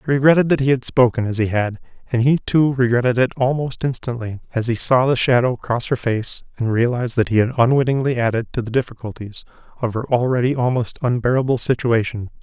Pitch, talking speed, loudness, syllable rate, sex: 125 Hz, 195 wpm, -19 LUFS, 6.0 syllables/s, male